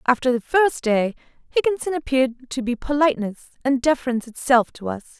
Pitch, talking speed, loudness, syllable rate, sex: 260 Hz, 160 wpm, -21 LUFS, 5.9 syllables/s, female